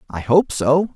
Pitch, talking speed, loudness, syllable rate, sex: 145 Hz, 190 wpm, -17 LUFS, 4.1 syllables/s, male